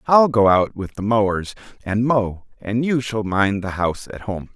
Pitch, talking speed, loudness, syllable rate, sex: 110 Hz, 210 wpm, -20 LUFS, 4.6 syllables/s, male